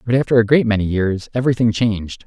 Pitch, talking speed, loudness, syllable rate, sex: 110 Hz, 210 wpm, -17 LUFS, 6.7 syllables/s, male